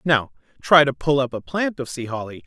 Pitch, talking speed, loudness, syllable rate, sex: 140 Hz, 245 wpm, -20 LUFS, 5.3 syllables/s, male